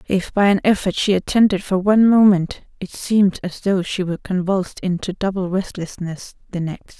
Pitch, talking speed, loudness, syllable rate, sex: 190 Hz, 180 wpm, -19 LUFS, 5.3 syllables/s, female